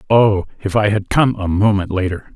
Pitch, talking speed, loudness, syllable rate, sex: 100 Hz, 205 wpm, -16 LUFS, 5.1 syllables/s, male